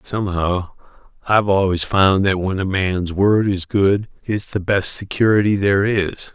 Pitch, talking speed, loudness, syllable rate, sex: 95 Hz, 160 wpm, -18 LUFS, 4.5 syllables/s, male